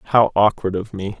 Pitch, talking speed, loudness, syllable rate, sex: 100 Hz, 200 wpm, -19 LUFS, 4.5 syllables/s, male